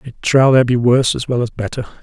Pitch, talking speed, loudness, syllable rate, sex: 125 Hz, 265 wpm, -15 LUFS, 6.8 syllables/s, male